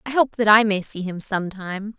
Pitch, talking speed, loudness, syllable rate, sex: 205 Hz, 240 wpm, -20 LUFS, 5.9 syllables/s, female